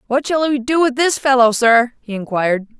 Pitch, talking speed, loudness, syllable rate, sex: 250 Hz, 215 wpm, -15 LUFS, 5.3 syllables/s, female